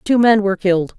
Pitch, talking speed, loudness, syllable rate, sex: 200 Hz, 245 wpm, -15 LUFS, 6.7 syllables/s, female